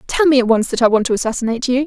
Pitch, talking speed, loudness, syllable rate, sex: 245 Hz, 320 wpm, -15 LUFS, 7.9 syllables/s, female